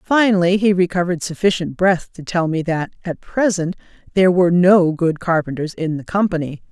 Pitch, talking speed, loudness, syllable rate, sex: 175 Hz, 170 wpm, -17 LUFS, 5.5 syllables/s, female